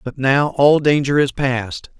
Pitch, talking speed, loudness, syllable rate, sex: 135 Hz, 180 wpm, -16 LUFS, 3.9 syllables/s, male